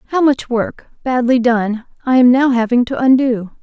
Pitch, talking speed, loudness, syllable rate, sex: 245 Hz, 180 wpm, -14 LUFS, 4.6 syllables/s, female